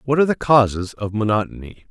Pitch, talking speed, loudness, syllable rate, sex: 115 Hz, 190 wpm, -18 LUFS, 6.2 syllables/s, male